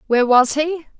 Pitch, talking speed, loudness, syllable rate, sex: 280 Hz, 180 wpm, -16 LUFS, 5.3 syllables/s, female